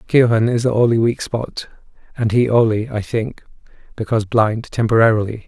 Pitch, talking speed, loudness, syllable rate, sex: 115 Hz, 155 wpm, -17 LUFS, 5.1 syllables/s, male